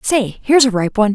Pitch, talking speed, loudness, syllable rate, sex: 230 Hz, 210 wpm, -15 LUFS, 6.9 syllables/s, female